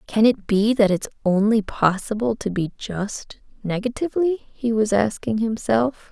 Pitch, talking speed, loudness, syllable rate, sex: 220 Hz, 145 wpm, -21 LUFS, 4.4 syllables/s, female